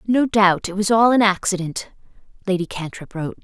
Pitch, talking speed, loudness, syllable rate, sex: 195 Hz, 175 wpm, -19 LUFS, 5.5 syllables/s, female